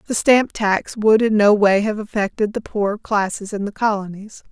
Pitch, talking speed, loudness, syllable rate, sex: 210 Hz, 200 wpm, -18 LUFS, 4.9 syllables/s, female